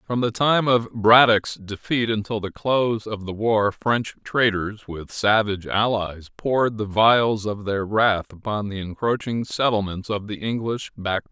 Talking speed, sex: 165 wpm, male